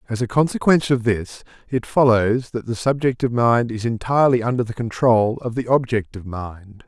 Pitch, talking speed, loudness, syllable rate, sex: 120 Hz, 175 wpm, -19 LUFS, 5.5 syllables/s, male